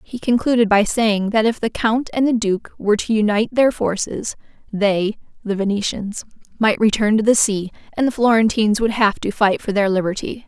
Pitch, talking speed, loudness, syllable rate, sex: 215 Hz, 195 wpm, -18 LUFS, 5.2 syllables/s, female